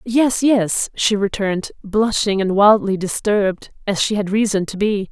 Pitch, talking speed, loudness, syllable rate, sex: 205 Hz, 165 wpm, -18 LUFS, 4.4 syllables/s, female